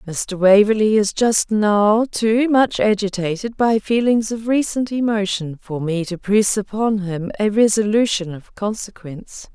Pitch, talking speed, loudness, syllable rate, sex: 210 Hz, 145 wpm, -18 LUFS, 4.2 syllables/s, female